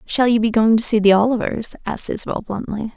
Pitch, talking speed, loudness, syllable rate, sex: 225 Hz, 225 wpm, -18 LUFS, 6.3 syllables/s, female